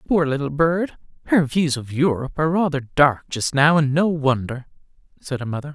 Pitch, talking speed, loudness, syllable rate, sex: 145 Hz, 190 wpm, -20 LUFS, 5.4 syllables/s, male